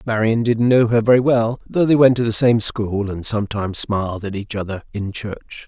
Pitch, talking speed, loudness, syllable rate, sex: 110 Hz, 220 wpm, -18 LUFS, 5.2 syllables/s, male